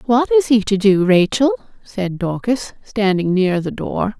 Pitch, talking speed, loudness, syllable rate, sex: 215 Hz, 170 wpm, -17 LUFS, 4.1 syllables/s, female